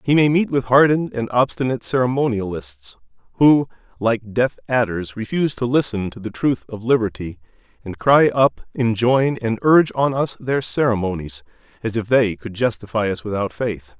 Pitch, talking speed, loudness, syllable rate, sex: 120 Hz, 165 wpm, -19 LUFS, 5.1 syllables/s, male